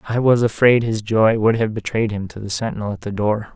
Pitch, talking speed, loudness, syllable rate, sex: 110 Hz, 255 wpm, -19 LUFS, 5.7 syllables/s, male